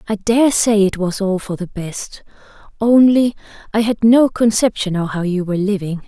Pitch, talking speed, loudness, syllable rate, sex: 205 Hz, 190 wpm, -16 LUFS, 4.9 syllables/s, female